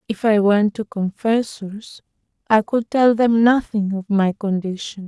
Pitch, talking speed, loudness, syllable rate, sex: 210 Hz, 155 wpm, -18 LUFS, 4.1 syllables/s, female